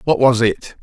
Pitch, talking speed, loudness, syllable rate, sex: 120 Hz, 220 wpm, -15 LUFS, 4.4 syllables/s, male